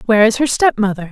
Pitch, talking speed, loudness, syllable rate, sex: 225 Hz, 215 wpm, -14 LUFS, 7.2 syllables/s, female